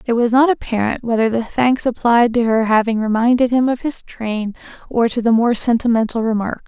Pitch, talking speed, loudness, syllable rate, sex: 235 Hz, 200 wpm, -17 LUFS, 5.3 syllables/s, female